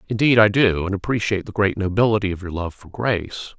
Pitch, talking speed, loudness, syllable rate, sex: 100 Hz, 200 wpm, -20 LUFS, 6.3 syllables/s, male